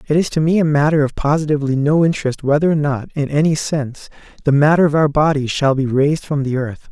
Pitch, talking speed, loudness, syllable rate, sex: 145 Hz, 235 wpm, -16 LUFS, 6.3 syllables/s, male